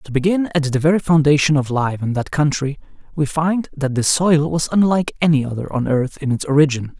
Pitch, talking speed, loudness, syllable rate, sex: 150 Hz, 215 wpm, -18 LUFS, 5.6 syllables/s, male